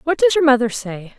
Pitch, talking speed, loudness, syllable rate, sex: 270 Hz, 255 wpm, -16 LUFS, 5.6 syllables/s, female